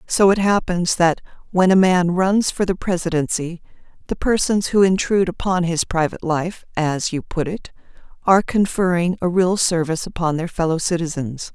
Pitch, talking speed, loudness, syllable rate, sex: 175 Hz, 165 wpm, -19 LUFS, 5.1 syllables/s, female